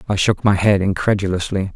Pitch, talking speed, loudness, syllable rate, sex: 95 Hz, 170 wpm, -18 LUFS, 5.7 syllables/s, male